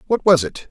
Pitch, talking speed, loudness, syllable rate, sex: 160 Hz, 255 wpm, -16 LUFS, 5.7 syllables/s, male